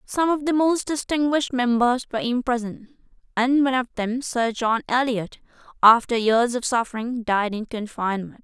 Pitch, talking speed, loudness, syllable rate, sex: 245 Hz, 155 wpm, -22 LUFS, 5.3 syllables/s, female